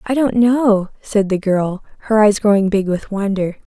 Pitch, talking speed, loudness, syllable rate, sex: 205 Hz, 195 wpm, -16 LUFS, 4.5 syllables/s, female